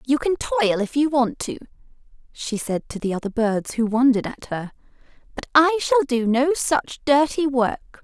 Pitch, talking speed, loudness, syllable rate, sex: 255 Hz, 185 wpm, -21 LUFS, 4.5 syllables/s, female